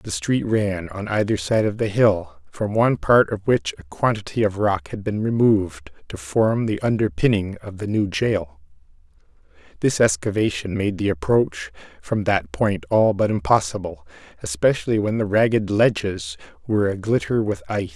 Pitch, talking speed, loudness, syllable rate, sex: 105 Hz, 165 wpm, -21 LUFS, 4.8 syllables/s, male